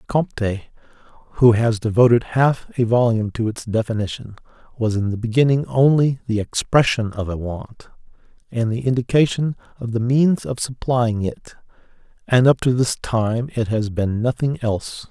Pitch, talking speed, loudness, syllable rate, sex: 120 Hz, 155 wpm, -19 LUFS, 5.0 syllables/s, male